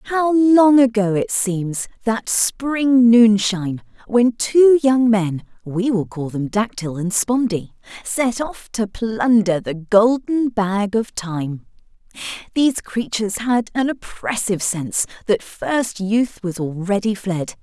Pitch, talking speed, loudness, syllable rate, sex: 220 Hz, 135 wpm, -18 LUFS, 3.3 syllables/s, female